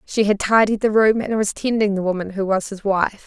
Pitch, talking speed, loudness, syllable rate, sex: 205 Hz, 255 wpm, -19 LUFS, 5.4 syllables/s, female